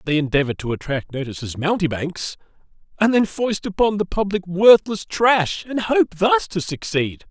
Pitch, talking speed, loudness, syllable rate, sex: 175 Hz, 165 wpm, -20 LUFS, 4.8 syllables/s, male